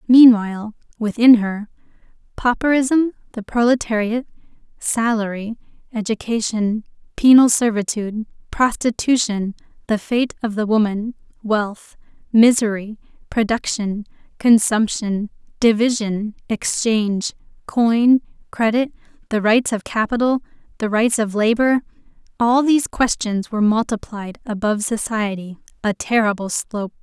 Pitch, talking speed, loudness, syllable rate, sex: 225 Hz, 90 wpm, -18 LUFS, 4.4 syllables/s, female